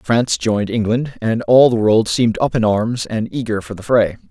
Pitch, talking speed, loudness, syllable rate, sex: 115 Hz, 225 wpm, -16 LUFS, 5.2 syllables/s, male